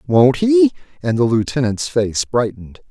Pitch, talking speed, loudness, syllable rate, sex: 125 Hz, 145 wpm, -17 LUFS, 4.5 syllables/s, male